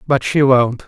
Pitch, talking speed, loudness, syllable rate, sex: 130 Hz, 205 wpm, -14 LUFS, 4.0 syllables/s, male